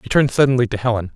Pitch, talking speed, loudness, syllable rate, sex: 120 Hz, 260 wpm, -17 LUFS, 8.1 syllables/s, male